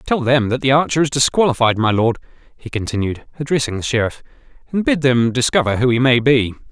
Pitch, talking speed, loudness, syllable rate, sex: 130 Hz, 195 wpm, -17 LUFS, 6.0 syllables/s, male